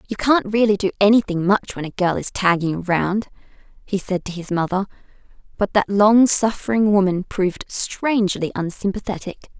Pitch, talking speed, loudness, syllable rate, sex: 195 Hz, 155 wpm, -19 LUFS, 5.2 syllables/s, female